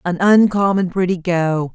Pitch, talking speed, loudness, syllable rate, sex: 180 Hz, 135 wpm, -16 LUFS, 4.3 syllables/s, female